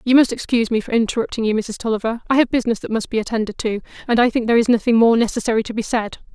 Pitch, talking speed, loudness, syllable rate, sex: 230 Hz, 265 wpm, -19 LUFS, 7.6 syllables/s, female